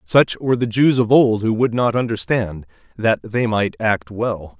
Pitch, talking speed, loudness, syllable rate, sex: 110 Hz, 195 wpm, -18 LUFS, 4.3 syllables/s, male